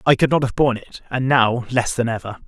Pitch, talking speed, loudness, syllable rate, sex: 120 Hz, 265 wpm, -19 LUFS, 5.9 syllables/s, male